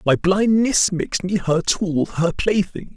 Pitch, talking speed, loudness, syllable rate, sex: 185 Hz, 160 wpm, -19 LUFS, 4.0 syllables/s, male